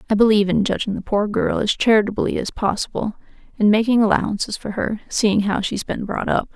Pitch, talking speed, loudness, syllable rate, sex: 210 Hz, 200 wpm, -20 LUFS, 5.8 syllables/s, female